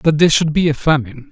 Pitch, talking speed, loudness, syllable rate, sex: 155 Hz, 275 wpm, -15 LUFS, 7.1 syllables/s, male